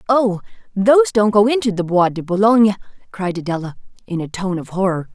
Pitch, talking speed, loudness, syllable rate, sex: 200 Hz, 185 wpm, -17 LUFS, 5.8 syllables/s, female